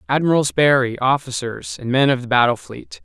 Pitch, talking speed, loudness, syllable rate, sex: 130 Hz, 180 wpm, -18 LUFS, 5.3 syllables/s, male